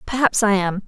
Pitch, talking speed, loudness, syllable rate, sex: 210 Hz, 205 wpm, -18 LUFS, 5.3 syllables/s, female